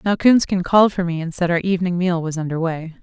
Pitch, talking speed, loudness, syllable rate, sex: 175 Hz, 260 wpm, -19 LUFS, 6.3 syllables/s, female